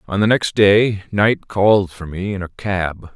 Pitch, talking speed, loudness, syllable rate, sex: 95 Hz, 210 wpm, -17 LUFS, 4.1 syllables/s, male